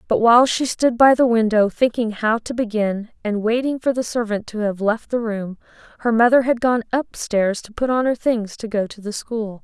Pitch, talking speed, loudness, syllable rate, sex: 225 Hz, 230 wpm, -19 LUFS, 5.0 syllables/s, female